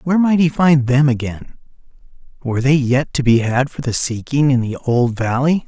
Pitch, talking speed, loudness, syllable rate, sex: 135 Hz, 200 wpm, -16 LUFS, 5.2 syllables/s, male